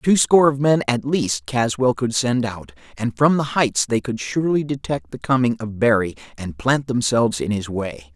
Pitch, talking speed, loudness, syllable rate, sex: 120 Hz, 205 wpm, -20 LUFS, 4.9 syllables/s, male